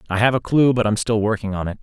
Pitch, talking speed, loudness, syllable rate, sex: 110 Hz, 330 wpm, -19 LUFS, 6.8 syllables/s, male